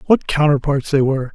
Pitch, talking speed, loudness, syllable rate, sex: 145 Hz, 180 wpm, -17 LUFS, 5.9 syllables/s, male